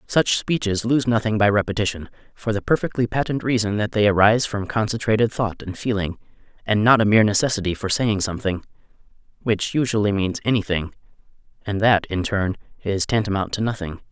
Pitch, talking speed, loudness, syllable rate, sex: 105 Hz, 160 wpm, -21 LUFS, 5.9 syllables/s, male